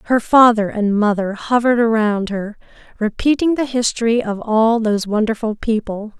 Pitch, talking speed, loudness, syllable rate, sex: 225 Hz, 145 wpm, -17 LUFS, 5.0 syllables/s, female